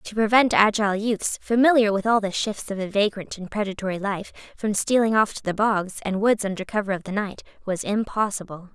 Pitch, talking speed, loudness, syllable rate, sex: 205 Hz, 205 wpm, -23 LUFS, 5.5 syllables/s, female